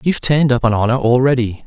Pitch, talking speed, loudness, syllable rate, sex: 125 Hz, 215 wpm, -15 LUFS, 7.0 syllables/s, male